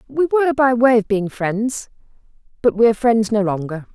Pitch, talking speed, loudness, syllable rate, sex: 225 Hz, 200 wpm, -17 LUFS, 5.3 syllables/s, female